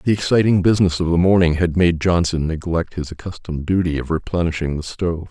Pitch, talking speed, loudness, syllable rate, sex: 85 Hz, 190 wpm, -19 LUFS, 6.1 syllables/s, male